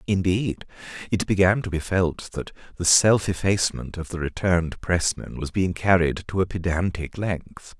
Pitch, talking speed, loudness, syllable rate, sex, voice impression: 90 Hz, 160 wpm, -23 LUFS, 4.7 syllables/s, male, masculine, adult-like, tensed, slightly hard, clear, slightly fluent, raspy, cool, calm, slightly mature, friendly, reassuring, wild, slightly lively, kind